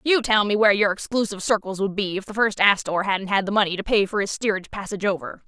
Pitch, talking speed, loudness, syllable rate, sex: 200 Hz, 265 wpm, -22 LUFS, 6.7 syllables/s, female